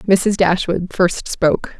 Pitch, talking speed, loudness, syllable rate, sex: 185 Hz, 135 wpm, -17 LUFS, 3.5 syllables/s, female